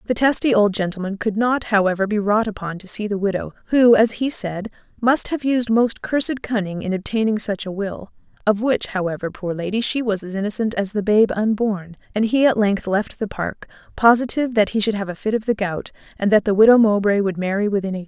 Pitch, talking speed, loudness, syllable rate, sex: 210 Hz, 230 wpm, -20 LUFS, 5.7 syllables/s, female